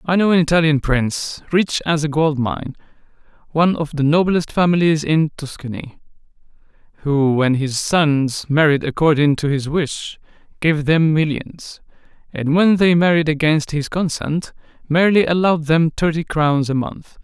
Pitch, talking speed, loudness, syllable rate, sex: 155 Hz, 150 wpm, -17 LUFS, 4.6 syllables/s, male